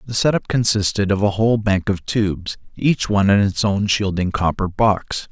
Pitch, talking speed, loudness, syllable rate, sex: 100 Hz, 190 wpm, -18 LUFS, 5.0 syllables/s, male